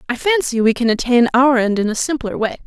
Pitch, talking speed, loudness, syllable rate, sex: 250 Hz, 250 wpm, -16 LUFS, 5.9 syllables/s, female